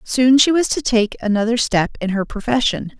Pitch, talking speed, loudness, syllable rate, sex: 230 Hz, 200 wpm, -17 LUFS, 5.0 syllables/s, female